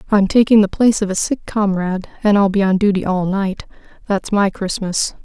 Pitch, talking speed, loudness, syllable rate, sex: 200 Hz, 205 wpm, -16 LUFS, 5.5 syllables/s, female